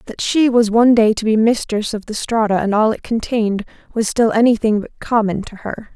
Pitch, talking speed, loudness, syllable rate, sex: 220 Hz, 220 wpm, -16 LUFS, 5.5 syllables/s, female